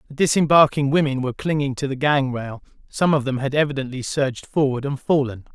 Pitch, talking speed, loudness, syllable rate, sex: 140 Hz, 195 wpm, -20 LUFS, 5.9 syllables/s, male